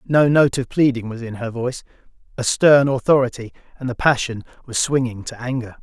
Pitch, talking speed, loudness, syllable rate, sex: 125 Hz, 185 wpm, -19 LUFS, 5.5 syllables/s, male